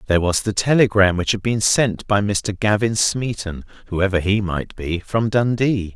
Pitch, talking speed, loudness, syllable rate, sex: 105 Hz, 160 wpm, -19 LUFS, 4.5 syllables/s, male